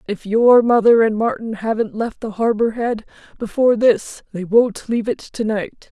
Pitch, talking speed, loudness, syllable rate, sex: 225 Hz, 170 wpm, -17 LUFS, 4.7 syllables/s, female